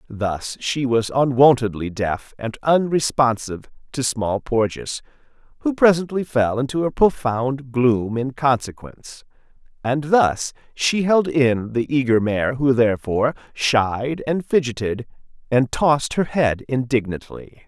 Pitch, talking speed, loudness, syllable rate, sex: 130 Hz, 125 wpm, -20 LUFS, 4.1 syllables/s, male